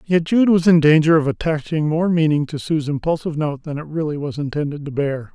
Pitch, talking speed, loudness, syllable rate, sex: 155 Hz, 225 wpm, -19 LUFS, 5.7 syllables/s, male